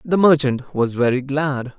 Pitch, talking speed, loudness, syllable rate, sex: 140 Hz, 170 wpm, -18 LUFS, 4.2 syllables/s, male